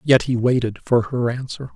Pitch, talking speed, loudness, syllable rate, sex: 125 Hz, 205 wpm, -20 LUFS, 4.9 syllables/s, male